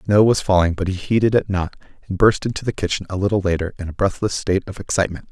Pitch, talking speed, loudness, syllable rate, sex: 95 Hz, 250 wpm, -20 LUFS, 6.9 syllables/s, male